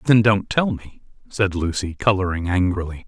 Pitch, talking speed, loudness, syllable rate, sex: 95 Hz, 155 wpm, -20 LUFS, 5.0 syllables/s, male